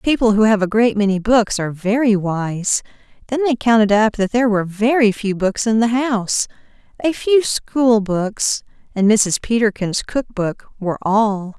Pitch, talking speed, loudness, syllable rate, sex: 215 Hz, 170 wpm, -17 LUFS, 4.7 syllables/s, female